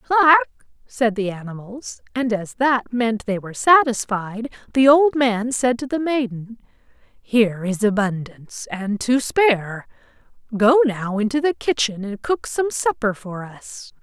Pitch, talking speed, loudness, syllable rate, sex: 235 Hz, 150 wpm, -19 LUFS, 4.2 syllables/s, female